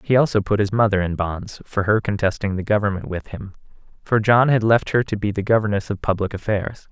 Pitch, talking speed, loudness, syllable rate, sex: 105 Hz, 225 wpm, -20 LUFS, 5.7 syllables/s, male